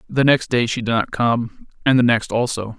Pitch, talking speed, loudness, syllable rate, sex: 120 Hz, 235 wpm, -18 LUFS, 4.9 syllables/s, male